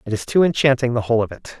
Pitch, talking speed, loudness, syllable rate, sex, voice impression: 125 Hz, 300 wpm, -18 LUFS, 7.5 syllables/s, male, masculine, adult-like, tensed, bright, clear, slightly nasal, intellectual, friendly, slightly unique, lively, slightly kind, light